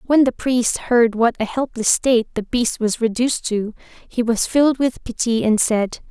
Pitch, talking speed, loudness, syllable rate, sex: 235 Hz, 195 wpm, -19 LUFS, 4.7 syllables/s, female